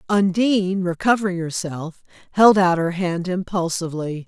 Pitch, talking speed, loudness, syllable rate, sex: 180 Hz, 110 wpm, -20 LUFS, 4.8 syllables/s, female